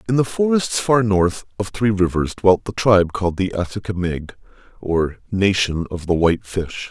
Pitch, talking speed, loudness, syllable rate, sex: 95 Hz, 175 wpm, -19 LUFS, 5.0 syllables/s, male